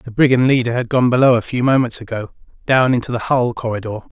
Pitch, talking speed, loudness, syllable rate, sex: 120 Hz, 215 wpm, -16 LUFS, 6.3 syllables/s, male